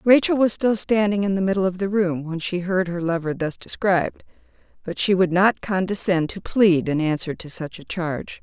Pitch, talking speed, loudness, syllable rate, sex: 185 Hz, 215 wpm, -21 LUFS, 5.2 syllables/s, female